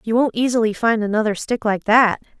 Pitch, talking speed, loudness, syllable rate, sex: 220 Hz, 200 wpm, -18 LUFS, 5.7 syllables/s, female